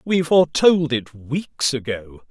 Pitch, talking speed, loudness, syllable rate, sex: 145 Hz, 130 wpm, -19 LUFS, 3.7 syllables/s, male